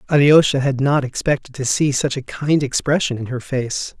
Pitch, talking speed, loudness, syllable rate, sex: 135 Hz, 195 wpm, -18 LUFS, 5.0 syllables/s, male